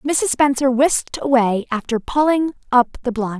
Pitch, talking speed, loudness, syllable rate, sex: 260 Hz, 160 wpm, -18 LUFS, 4.6 syllables/s, female